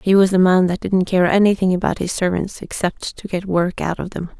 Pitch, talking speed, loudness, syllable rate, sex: 185 Hz, 245 wpm, -18 LUFS, 5.4 syllables/s, female